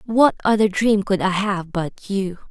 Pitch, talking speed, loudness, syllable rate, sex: 200 Hz, 190 wpm, -20 LUFS, 4.1 syllables/s, female